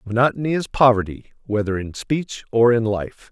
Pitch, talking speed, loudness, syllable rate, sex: 120 Hz, 165 wpm, -20 LUFS, 5.0 syllables/s, male